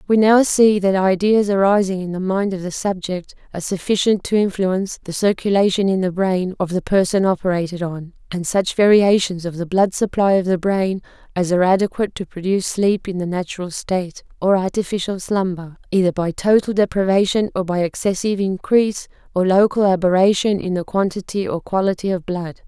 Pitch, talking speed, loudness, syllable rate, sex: 190 Hz, 175 wpm, -18 LUFS, 5.6 syllables/s, female